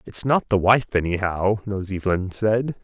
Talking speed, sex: 170 wpm, male